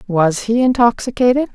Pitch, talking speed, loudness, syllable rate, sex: 230 Hz, 115 wpm, -15 LUFS, 5.2 syllables/s, female